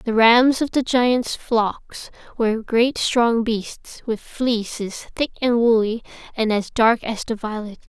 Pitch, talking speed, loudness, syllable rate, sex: 230 Hz, 160 wpm, -20 LUFS, 3.6 syllables/s, female